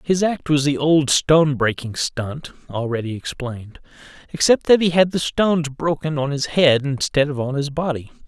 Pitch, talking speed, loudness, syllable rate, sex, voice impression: 145 Hz, 180 wpm, -19 LUFS, 4.9 syllables/s, male, very masculine, adult-like, slightly middle-aged, slightly thick, tensed, powerful, slightly bright, slightly soft, slightly muffled, fluent, slightly raspy, slightly cool, intellectual, refreshing, very sincere, calm, slightly mature, friendly, reassuring, slightly unique, elegant, slightly wild, slightly lively, kind, slightly modest